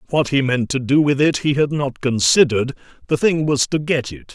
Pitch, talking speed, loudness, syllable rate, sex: 140 Hz, 235 wpm, -18 LUFS, 5.4 syllables/s, male